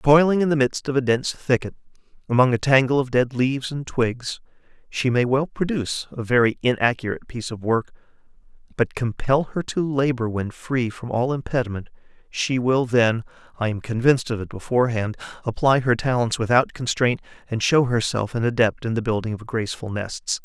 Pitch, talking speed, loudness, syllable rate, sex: 125 Hz, 175 wpm, -22 LUFS, 5.5 syllables/s, male